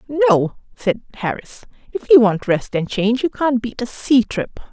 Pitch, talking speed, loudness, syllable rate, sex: 235 Hz, 190 wpm, -18 LUFS, 4.5 syllables/s, female